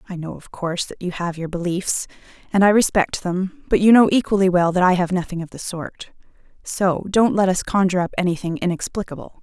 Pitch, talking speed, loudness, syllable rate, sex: 185 Hz, 205 wpm, -20 LUFS, 5.8 syllables/s, female